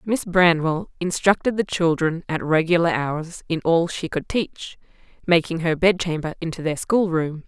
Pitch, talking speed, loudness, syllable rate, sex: 170 Hz, 160 wpm, -21 LUFS, 4.5 syllables/s, female